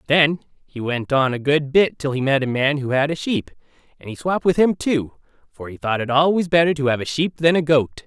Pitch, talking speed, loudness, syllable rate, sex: 145 Hz, 260 wpm, -19 LUFS, 5.5 syllables/s, male